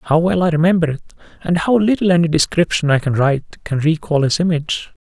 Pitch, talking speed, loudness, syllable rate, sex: 160 Hz, 205 wpm, -16 LUFS, 6.0 syllables/s, male